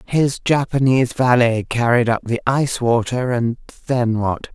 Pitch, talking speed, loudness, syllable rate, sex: 120 Hz, 130 wpm, -18 LUFS, 4.5 syllables/s, female